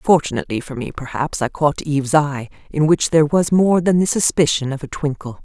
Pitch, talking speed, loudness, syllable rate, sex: 150 Hz, 210 wpm, -18 LUFS, 5.6 syllables/s, female